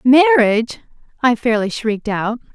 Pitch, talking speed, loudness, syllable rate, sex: 240 Hz, 120 wpm, -16 LUFS, 4.7 syllables/s, female